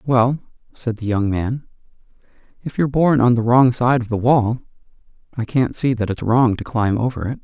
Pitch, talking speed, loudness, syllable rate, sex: 120 Hz, 200 wpm, -18 LUFS, 5.1 syllables/s, male